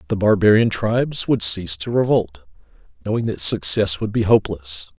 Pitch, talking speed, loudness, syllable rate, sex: 100 Hz, 155 wpm, -18 LUFS, 5.5 syllables/s, male